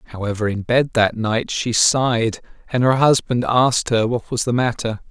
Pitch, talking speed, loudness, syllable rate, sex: 120 Hz, 190 wpm, -18 LUFS, 4.7 syllables/s, male